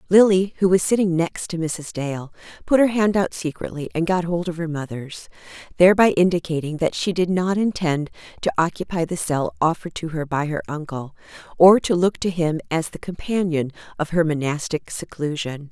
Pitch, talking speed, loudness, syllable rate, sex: 170 Hz, 185 wpm, -21 LUFS, 5.2 syllables/s, female